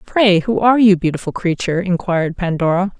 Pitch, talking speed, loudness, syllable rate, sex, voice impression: 185 Hz, 160 wpm, -16 LUFS, 6.0 syllables/s, female, very feminine, very middle-aged, thin, very tensed, powerful, bright, slightly hard, very clear, fluent, slightly raspy, cool, intellectual, slightly refreshing, sincere, calm, slightly friendly, reassuring, very unique, elegant, slightly wild, lively, strict, intense, slightly sharp, slightly light